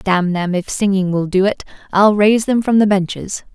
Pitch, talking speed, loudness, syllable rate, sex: 195 Hz, 220 wpm, -15 LUFS, 5.1 syllables/s, female